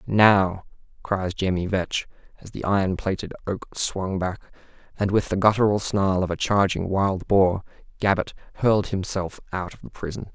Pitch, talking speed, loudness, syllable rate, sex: 95 Hz, 160 wpm, -23 LUFS, 4.7 syllables/s, male